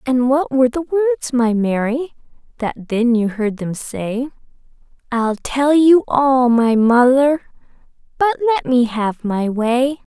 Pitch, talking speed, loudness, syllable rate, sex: 255 Hz, 150 wpm, -17 LUFS, 3.7 syllables/s, female